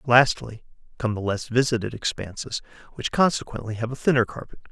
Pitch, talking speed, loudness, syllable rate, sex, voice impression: 120 Hz, 155 wpm, -24 LUFS, 5.7 syllables/s, male, masculine, adult-like, relaxed, slightly bright, muffled, slightly raspy, friendly, reassuring, unique, kind